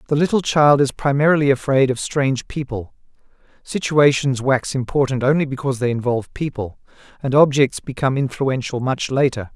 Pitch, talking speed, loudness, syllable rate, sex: 135 Hz, 145 wpm, -19 LUFS, 5.6 syllables/s, male